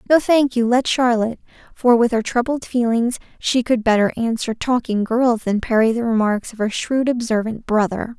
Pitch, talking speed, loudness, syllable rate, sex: 235 Hz, 185 wpm, -18 LUFS, 5.0 syllables/s, female